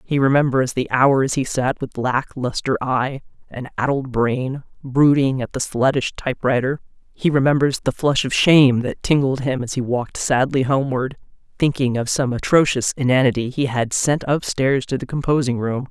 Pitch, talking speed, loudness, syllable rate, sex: 130 Hz, 170 wpm, -19 LUFS, 4.9 syllables/s, female